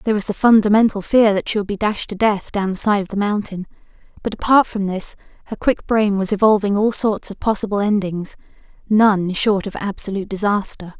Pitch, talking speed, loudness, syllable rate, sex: 205 Hz, 195 wpm, -18 LUFS, 5.6 syllables/s, female